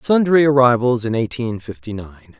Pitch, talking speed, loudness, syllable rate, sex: 120 Hz, 150 wpm, -16 LUFS, 5.5 syllables/s, male